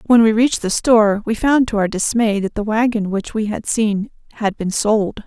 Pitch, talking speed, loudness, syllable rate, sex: 215 Hz, 230 wpm, -17 LUFS, 5.0 syllables/s, female